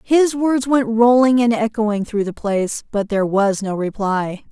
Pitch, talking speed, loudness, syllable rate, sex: 225 Hz, 185 wpm, -18 LUFS, 4.4 syllables/s, female